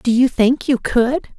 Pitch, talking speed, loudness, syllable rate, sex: 250 Hz, 215 wpm, -16 LUFS, 4.0 syllables/s, female